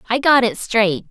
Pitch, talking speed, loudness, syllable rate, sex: 225 Hz, 215 wpm, -16 LUFS, 4.5 syllables/s, female